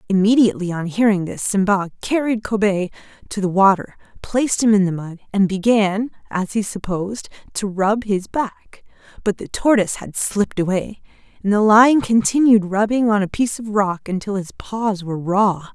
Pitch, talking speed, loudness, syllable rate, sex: 205 Hz, 170 wpm, -19 LUFS, 5.1 syllables/s, female